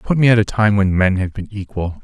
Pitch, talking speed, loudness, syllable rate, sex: 100 Hz, 295 wpm, -16 LUFS, 5.5 syllables/s, male